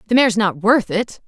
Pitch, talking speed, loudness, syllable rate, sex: 215 Hz, 235 wpm, -17 LUFS, 5.9 syllables/s, female